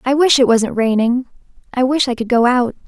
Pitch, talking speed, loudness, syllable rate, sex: 245 Hz, 230 wpm, -15 LUFS, 5.4 syllables/s, female